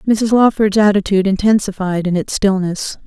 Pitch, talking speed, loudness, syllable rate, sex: 200 Hz, 135 wpm, -15 LUFS, 5.2 syllables/s, female